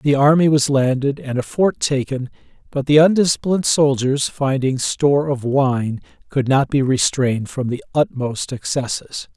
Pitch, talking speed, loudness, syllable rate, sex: 135 Hz, 155 wpm, -18 LUFS, 4.6 syllables/s, male